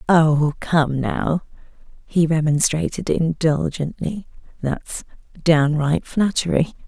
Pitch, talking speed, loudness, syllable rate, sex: 155 Hz, 70 wpm, -20 LUFS, 3.4 syllables/s, female